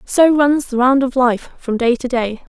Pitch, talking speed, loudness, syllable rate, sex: 255 Hz, 235 wpm, -16 LUFS, 4.2 syllables/s, female